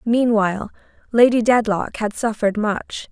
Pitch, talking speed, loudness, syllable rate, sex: 220 Hz, 115 wpm, -19 LUFS, 4.6 syllables/s, female